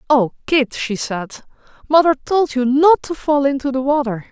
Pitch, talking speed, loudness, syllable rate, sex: 275 Hz, 180 wpm, -17 LUFS, 4.6 syllables/s, female